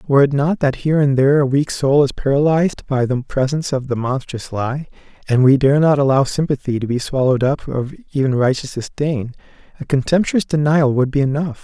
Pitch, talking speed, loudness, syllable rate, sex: 140 Hz, 200 wpm, -17 LUFS, 5.8 syllables/s, male